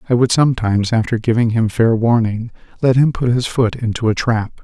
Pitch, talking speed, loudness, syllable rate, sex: 115 Hz, 205 wpm, -16 LUFS, 5.5 syllables/s, male